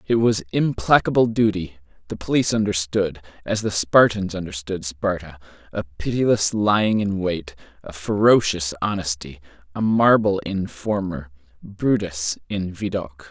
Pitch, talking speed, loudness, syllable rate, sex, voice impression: 95 Hz, 115 wpm, -21 LUFS, 4.5 syllables/s, male, masculine, middle-aged, tensed, powerful, hard, clear, cool, calm, mature, wild, lively, strict